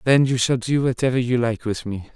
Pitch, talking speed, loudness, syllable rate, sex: 120 Hz, 250 wpm, -21 LUFS, 5.5 syllables/s, male